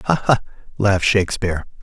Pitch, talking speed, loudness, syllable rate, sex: 105 Hz, 130 wpm, -19 LUFS, 7.1 syllables/s, male